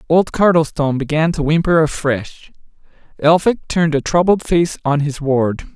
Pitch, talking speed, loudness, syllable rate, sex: 155 Hz, 145 wpm, -16 LUFS, 4.8 syllables/s, male